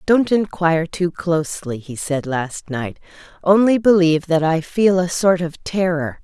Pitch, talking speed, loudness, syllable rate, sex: 170 Hz, 165 wpm, -18 LUFS, 4.4 syllables/s, female